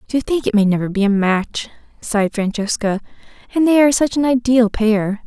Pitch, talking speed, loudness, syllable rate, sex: 225 Hz, 195 wpm, -17 LUFS, 5.5 syllables/s, female